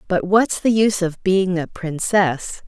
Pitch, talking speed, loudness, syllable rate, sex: 185 Hz, 180 wpm, -19 LUFS, 4.2 syllables/s, female